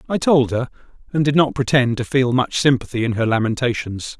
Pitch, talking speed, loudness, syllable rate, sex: 125 Hz, 200 wpm, -18 LUFS, 5.6 syllables/s, male